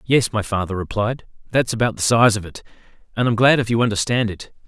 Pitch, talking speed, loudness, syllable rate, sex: 110 Hz, 220 wpm, -19 LUFS, 6.0 syllables/s, male